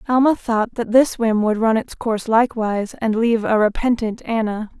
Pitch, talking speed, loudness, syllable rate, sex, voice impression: 225 Hz, 190 wpm, -19 LUFS, 5.3 syllables/s, female, feminine, adult-like, tensed, slightly weak, soft, clear, fluent, slightly raspy, intellectual, calm, reassuring, elegant, kind, modest